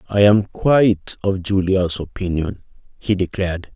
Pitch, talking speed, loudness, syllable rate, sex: 95 Hz, 130 wpm, -18 LUFS, 4.5 syllables/s, male